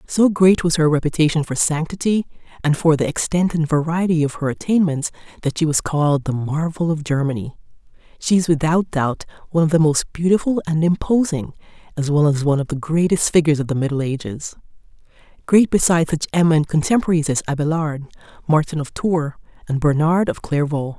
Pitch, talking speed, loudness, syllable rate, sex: 160 Hz, 170 wpm, -19 LUFS, 5.9 syllables/s, female